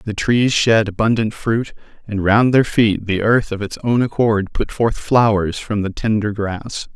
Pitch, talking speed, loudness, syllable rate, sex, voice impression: 110 Hz, 190 wpm, -17 LUFS, 4.2 syllables/s, male, masculine, adult-like, slightly soft, slightly sincere, calm, friendly, slightly sweet